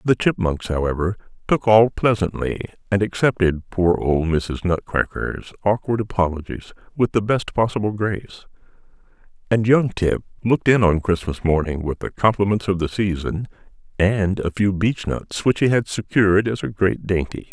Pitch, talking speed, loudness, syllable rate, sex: 100 Hz, 160 wpm, -20 LUFS, 4.9 syllables/s, male